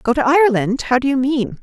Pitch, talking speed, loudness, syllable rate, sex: 250 Hz, 220 wpm, -16 LUFS, 5.7 syllables/s, female